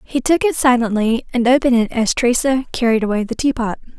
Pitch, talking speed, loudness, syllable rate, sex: 245 Hz, 210 wpm, -16 LUFS, 6.1 syllables/s, female